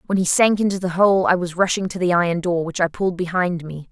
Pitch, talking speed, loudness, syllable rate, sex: 180 Hz, 275 wpm, -19 LUFS, 6.1 syllables/s, female